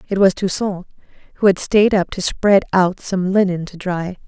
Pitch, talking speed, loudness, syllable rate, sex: 190 Hz, 195 wpm, -17 LUFS, 4.7 syllables/s, female